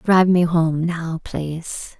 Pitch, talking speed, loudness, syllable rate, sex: 165 Hz, 150 wpm, -20 LUFS, 3.7 syllables/s, female